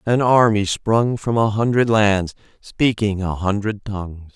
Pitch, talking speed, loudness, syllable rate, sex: 105 Hz, 150 wpm, -18 LUFS, 4.0 syllables/s, male